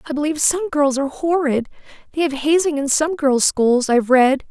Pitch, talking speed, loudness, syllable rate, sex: 290 Hz, 200 wpm, -17 LUFS, 5.5 syllables/s, female